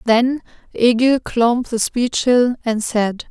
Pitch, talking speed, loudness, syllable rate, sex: 240 Hz, 145 wpm, -17 LUFS, 3.4 syllables/s, female